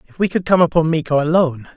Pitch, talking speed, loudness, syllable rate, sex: 160 Hz, 240 wpm, -16 LUFS, 7.1 syllables/s, male